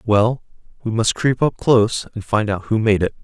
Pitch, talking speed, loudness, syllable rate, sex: 110 Hz, 225 wpm, -18 LUFS, 5.0 syllables/s, male